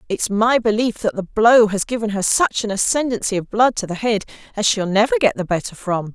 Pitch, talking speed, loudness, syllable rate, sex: 215 Hz, 235 wpm, -18 LUFS, 5.5 syllables/s, female